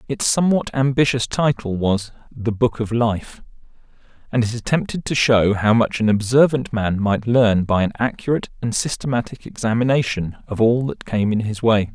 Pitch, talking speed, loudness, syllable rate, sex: 115 Hz, 170 wpm, -19 LUFS, 5.1 syllables/s, male